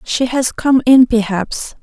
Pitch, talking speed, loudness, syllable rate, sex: 245 Hz, 165 wpm, -14 LUFS, 3.7 syllables/s, female